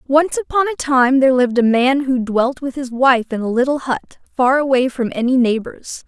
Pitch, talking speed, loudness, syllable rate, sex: 260 Hz, 215 wpm, -16 LUFS, 4.9 syllables/s, female